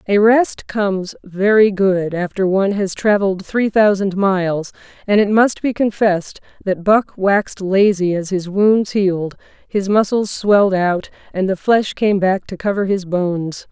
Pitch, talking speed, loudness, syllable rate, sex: 195 Hz, 165 wpm, -16 LUFS, 4.4 syllables/s, female